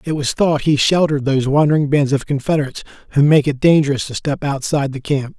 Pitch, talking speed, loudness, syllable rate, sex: 145 Hz, 210 wpm, -16 LUFS, 6.4 syllables/s, male